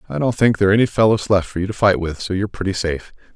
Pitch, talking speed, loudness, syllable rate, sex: 95 Hz, 285 wpm, -18 LUFS, 7.4 syllables/s, male